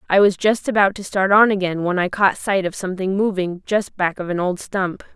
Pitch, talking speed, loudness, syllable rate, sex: 190 Hz, 245 wpm, -19 LUFS, 5.3 syllables/s, female